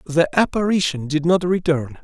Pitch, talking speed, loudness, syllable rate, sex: 165 Hz, 145 wpm, -19 LUFS, 4.8 syllables/s, male